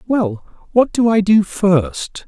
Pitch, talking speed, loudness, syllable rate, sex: 195 Hz, 160 wpm, -16 LUFS, 3.2 syllables/s, male